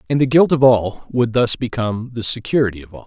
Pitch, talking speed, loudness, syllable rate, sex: 120 Hz, 235 wpm, -17 LUFS, 6.0 syllables/s, male